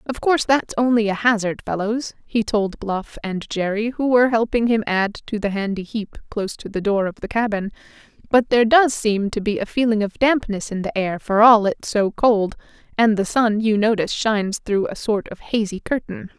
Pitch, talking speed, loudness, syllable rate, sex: 215 Hz, 210 wpm, -20 LUFS, 5.2 syllables/s, female